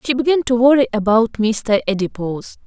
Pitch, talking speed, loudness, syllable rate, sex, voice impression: 230 Hz, 160 wpm, -16 LUFS, 5.5 syllables/s, female, feminine, adult-like, powerful, slightly muffled, halting, slightly friendly, unique, slightly lively, slightly sharp